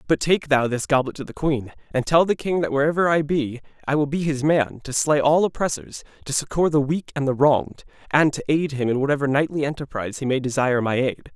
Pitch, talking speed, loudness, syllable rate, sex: 145 Hz, 240 wpm, -22 LUFS, 6.0 syllables/s, male